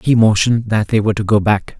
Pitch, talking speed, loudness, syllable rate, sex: 110 Hz, 270 wpm, -15 LUFS, 6.5 syllables/s, male